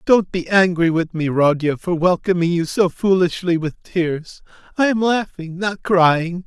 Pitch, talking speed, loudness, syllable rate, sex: 175 Hz, 165 wpm, -18 LUFS, 4.2 syllables/s, male